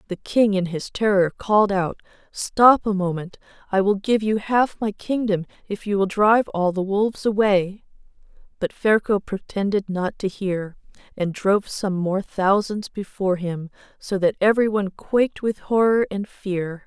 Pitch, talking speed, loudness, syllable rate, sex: 200 Hz, 165 wpm, -21 LUFS, 4.6 syllables/s, female